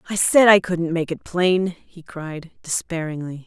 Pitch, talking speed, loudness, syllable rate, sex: 170 Hz, 175 wpm, -19 LUFS, 4.1 syllables/s, female